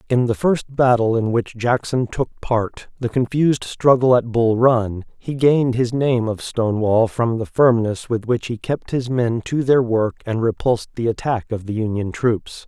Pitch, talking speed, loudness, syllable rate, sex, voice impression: 120 Hz, 195 wpm, -19 LUFS, 4.5 syllables/s, male, very masculine, very adult-like, middle-aged, very thick, tensed, powerful, slightly bright, slightly soft, clear, very fluent, very cool, very intellectual, refreshing, very sincere, very calm, very mature, friendly, reassuring, unique, slightly elegant, wild, slightly sweet, slightly lively, kind, slightly modest